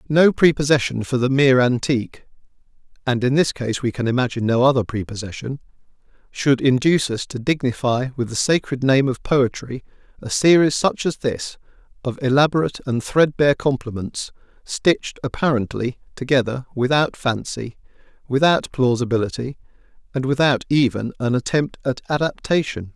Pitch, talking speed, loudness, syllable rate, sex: 130 Hz, 135 wpm, -20 LUFS, 4.6 syllables/s, male